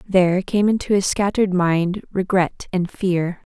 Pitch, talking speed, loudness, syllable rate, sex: 185 Hz, 150 wpm, -20 LUFS, 4.4 syllables/s, female